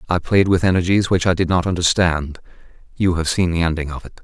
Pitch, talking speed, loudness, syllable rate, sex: 90 Hz, 225 wpm, -18 LUFS, 6.0 syllables/s, male